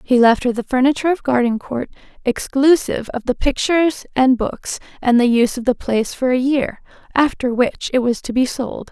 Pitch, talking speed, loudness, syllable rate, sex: 255 Hz, 195 wpm, -18 LUFS, 5.5 syllables/s, female